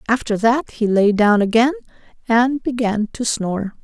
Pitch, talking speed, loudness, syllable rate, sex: 230 Hz, 155 wpm, -18 LUFS, 4.6 syllables/s, female